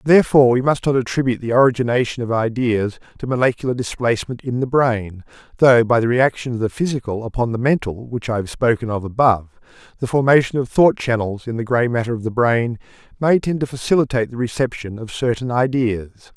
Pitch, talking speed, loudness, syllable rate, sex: 120 Hz, 190 wpm, -18 LUFS, 6.1 syllables/s, male